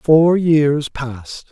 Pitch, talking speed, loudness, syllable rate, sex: 145 Hz, 120 wpm, -15 LUFS, 2.8 syllables/s, male